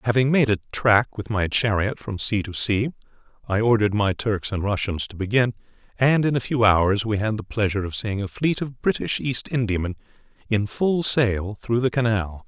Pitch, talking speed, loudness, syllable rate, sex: 110 Hz, 200 wpm, -22 LUFS, 5.1 syllables/s, male